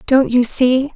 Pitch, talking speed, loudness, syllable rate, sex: 255 Hz, 190 wpm, -15 LUFS, 3.7 syllables/s, female